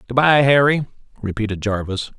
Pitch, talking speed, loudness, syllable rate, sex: 120 Hz, 135 wpm, -18 LUFS, 5.5 syllables/s, male